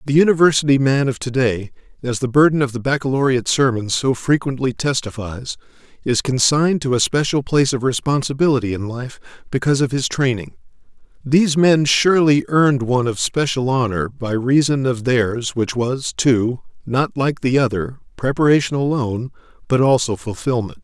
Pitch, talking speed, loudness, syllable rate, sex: 130 Hz, 155 wpm, -18 LUFS, 5.4 syllables/s, male